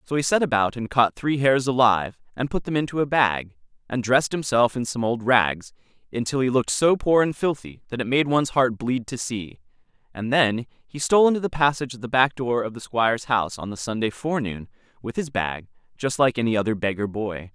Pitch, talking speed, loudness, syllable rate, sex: 120 Hz, 220 wpm, -23 LUFS, 5.7 syllables/s, male